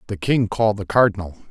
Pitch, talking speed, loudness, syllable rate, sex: 105 Hz, 200 wpm, -19 LUFS, 6.6 syllables/s, male